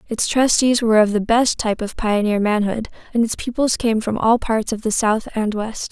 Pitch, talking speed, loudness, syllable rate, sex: 220 Hz, 225 wpm, -18 LUFS, 5.1 syllables/s, female